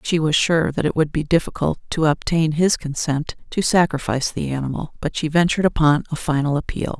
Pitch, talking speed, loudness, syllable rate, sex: 155 Hz, 195 wpm, -20 LUFS, 5.7 syllables/s, female